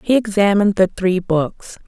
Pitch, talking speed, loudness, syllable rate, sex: 195 Hz, 160 wpm, -17 LUFS, 4.9 syllables/s, female